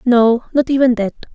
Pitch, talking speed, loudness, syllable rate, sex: 245 Hz, 180 wpm, -15 LUFS, 5.1 syllables/s, female